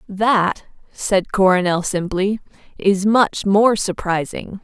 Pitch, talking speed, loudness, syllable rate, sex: 195 Hz, 105 wpm, -18 LUFS, 3.4 syllables/s, female